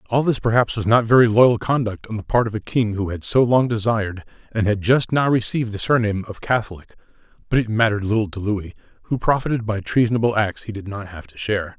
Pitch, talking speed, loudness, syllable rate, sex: 110 Hz, 230 wpm, -20 LUFS, 6.2 syllables/s, male